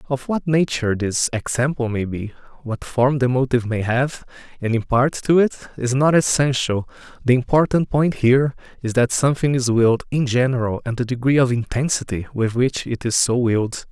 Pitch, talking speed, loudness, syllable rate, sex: 125 Hz, 180 wpm, -19 LUFS, 5.3 syllables/s, male